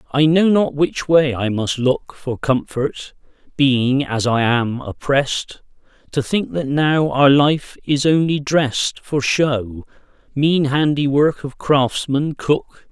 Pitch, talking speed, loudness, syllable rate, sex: 140 Hz, 145 wpm, -18 LUFS, 3.5 syllables/s, male